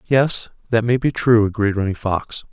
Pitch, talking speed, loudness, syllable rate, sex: 110 Hz, 190 wpm, -19 LUFS, 4.7 syllables/s, male